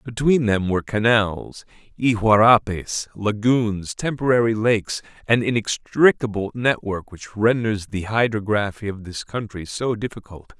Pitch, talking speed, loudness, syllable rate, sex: 110 Hz, 115 wpm, -21 LUFS, 4.4 syllables/s, male